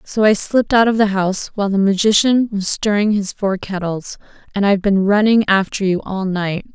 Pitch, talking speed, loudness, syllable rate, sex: 200 Hz, 205 wpm, -16 LUFS, 5.4 syllables/s, female